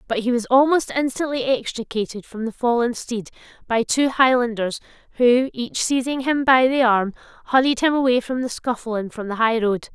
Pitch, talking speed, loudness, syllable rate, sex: 245 Hz, 180 wpm, -20 LUFS, 5.1 syllables/s, female